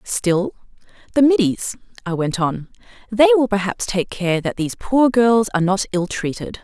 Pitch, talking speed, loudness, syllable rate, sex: 205 Hz, 165 wpm, -18 LUFS, 4.8 syllables/s, female